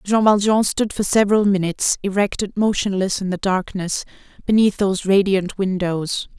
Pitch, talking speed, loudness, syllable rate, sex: 195 Hz, 150 wpm, -19 LUFS, 5.1 syllables/s, female